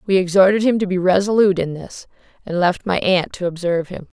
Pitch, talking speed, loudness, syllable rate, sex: 185 Hz, 215 wpm, -17 LUFS, 6.1 syllables/s, female